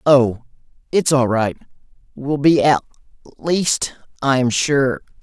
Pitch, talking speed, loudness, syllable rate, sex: 135 Hz, 115 wpm, -18 LUFS, 3.5 syllables/s, male